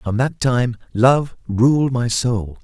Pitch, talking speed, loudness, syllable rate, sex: 120 Hz, 160 wpm, -18 LUFS, 3.0 syllables/s, male